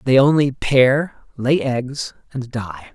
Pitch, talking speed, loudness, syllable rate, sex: 130 Hz, 145 wpm, -18 LUFS, 3.2 syllables/s, male